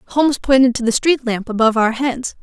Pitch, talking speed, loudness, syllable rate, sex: 250 Hz, 225 wpm, -16 LUFS, 5.9 syllables/s, female